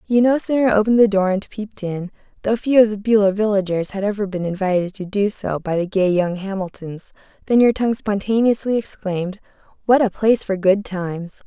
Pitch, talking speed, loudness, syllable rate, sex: 200 Hz, 200 wpm, -19 LUFS, 5.7 syllables/s, female